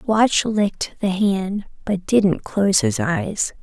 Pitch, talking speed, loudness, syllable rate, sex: 200 Hz, 150 wpm, -20 LUFS, 3.3 syllables/s, female